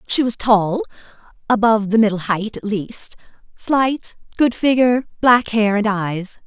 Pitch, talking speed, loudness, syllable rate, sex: 220 Hz, 150 wpm, -17 LUFS, 4.3 syllables/s, female